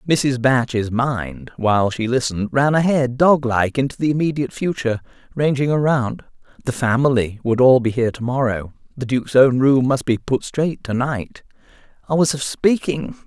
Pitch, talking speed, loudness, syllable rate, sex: 130 Hz, 170 wpm, -19 LUFS, 5.0 syllables/s, male